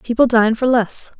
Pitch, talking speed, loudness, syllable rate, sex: 235 Hz, 200 wpm, -15 LUFS, 4.7 syllables/s, female